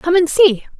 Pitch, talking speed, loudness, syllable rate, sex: 330 Hz, 225 wpm, -13 LUFS, 4.7 syllables/s, female